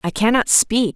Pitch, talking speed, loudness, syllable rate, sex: 220 Hz, 190 wpm, -16 LUFS, 4.4 syllables/s, female